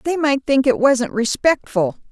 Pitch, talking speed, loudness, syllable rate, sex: 255 Hz, 170 wpm, -17 LUFS, 4.3 syllables/s, female